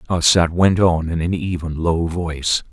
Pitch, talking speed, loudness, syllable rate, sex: 85 Hz, 175 wpm, -18 LUFS, 4.4 syllables/s, male